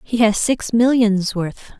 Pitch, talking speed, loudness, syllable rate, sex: 220 Hz, 165 wpm, -17 LUFS, 3.6 syllables/s, female